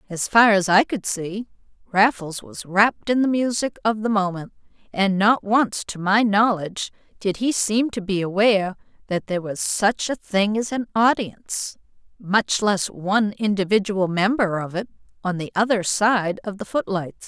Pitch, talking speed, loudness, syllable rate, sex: 205 Hz, 175 wpm, -21 LUFS, 4.5 syllables/s, female